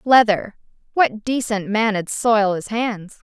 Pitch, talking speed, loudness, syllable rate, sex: 220 Hz, 110 wpm, -19 LUFS, 3.2 syllables/s, female